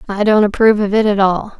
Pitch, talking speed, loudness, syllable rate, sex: 205 Hz, 265 wpm, -13 LUFS, 6.4 syllables/s, female